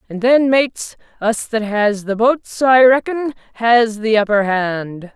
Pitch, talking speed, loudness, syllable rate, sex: 230 Hz, 165 wpm, -15 LUFS, 3.8 syllables/s, female